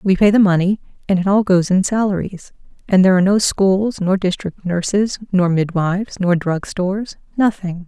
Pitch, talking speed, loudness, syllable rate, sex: 190 Hz, 170 wpm, -17 LUFS, 5.1 syllables/s, female